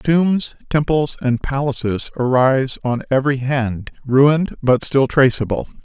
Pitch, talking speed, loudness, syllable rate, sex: 135 Hz, 125 wpm, -17 LUFS, 4.3 syllables/s, male